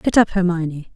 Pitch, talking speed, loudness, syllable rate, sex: 175 Hz, 190 wpm, -19 LUFS, 5.5 syllables/s, female